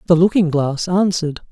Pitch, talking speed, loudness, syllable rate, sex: 170 Hz, 160 wpm, -17 LUFS, 5.7 syllables/s, male